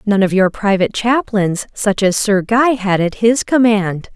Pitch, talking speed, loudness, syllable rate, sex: 210 Hz, 190 wpm, -15 LUFS, 4.3 syllables/s, female